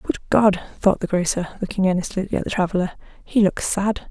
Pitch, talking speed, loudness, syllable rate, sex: 190 Hz, 190 wpm, -21 LUFS, 5.5 syllables/s, female